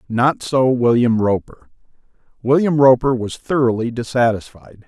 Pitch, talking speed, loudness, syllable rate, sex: 125 Hz, 110 wpm, -17 LUFS, 4.5 syllables/s, male